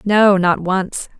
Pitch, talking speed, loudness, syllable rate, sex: 190 Hz, 150 wpm, -16 LUFS, 2.9 syllables/s, female